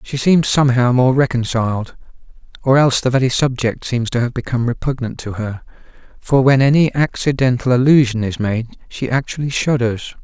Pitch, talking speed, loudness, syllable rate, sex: 125 Hz, 160 wpm, -16 LUFS, 5.5 syllables/s, male